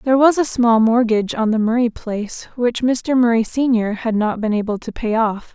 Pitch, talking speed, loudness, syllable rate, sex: 230 Hz, 215 wpm, -18 LUFS, 5.2 syllables/s, female